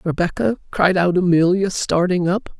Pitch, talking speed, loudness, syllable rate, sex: 180 Hz, 140 wpm, -18 LUFS, 4.8 syllables/s, female